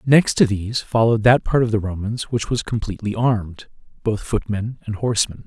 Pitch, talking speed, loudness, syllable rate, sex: 110 Hz, 185 wpm, -20 LUFS, 5.7 syllables/s, male